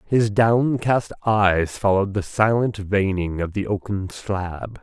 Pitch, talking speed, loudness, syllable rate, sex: 100 Hz, 135 wpm, -21 LUFS, 3.7 syllables/s, male